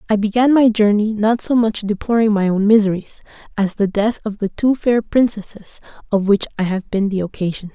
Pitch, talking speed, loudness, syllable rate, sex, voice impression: 210 Hz, 200 wpm, -17 LUFS, 5.3 syllables/s, female, feminine, adult-like, relaxed, powerful, slightly bright, soft, slightly muffled, slightly raspy, intellectual, calm, friendly, reassuring, kind, modest